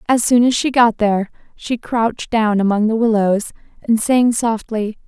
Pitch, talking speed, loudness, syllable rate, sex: 225 Hz, 175 wpm, -16 LUFS, 4.7 syllables/s, female